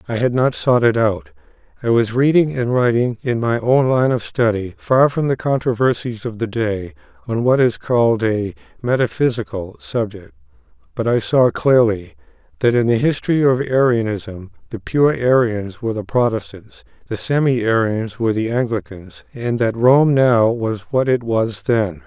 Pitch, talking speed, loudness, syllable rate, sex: 120 Hz, 170 wpm, -18 LUFS, 4.6 syllables/s, male